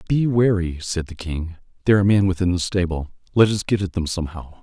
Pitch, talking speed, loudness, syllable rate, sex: 95 Hz, 220 wpm, -21 LUFS, 6.2 syllables/s, male